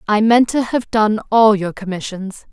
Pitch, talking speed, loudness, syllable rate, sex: 215 Hz, 190 wpm, -16 LUFS, 4.5 syllables/s, female